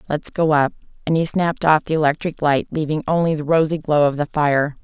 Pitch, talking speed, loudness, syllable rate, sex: 155 Hz, 225 wpm, -19 LUFS, 5.7 syllables/s, female